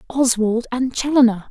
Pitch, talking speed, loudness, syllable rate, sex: 240 Hz, 120 wpm, -18 LUFS, 4.8 syllables/s, female